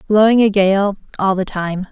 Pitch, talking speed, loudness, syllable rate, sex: 200 Hz, 190 wpm, -15 LUFS, 4.6 syllables/s, female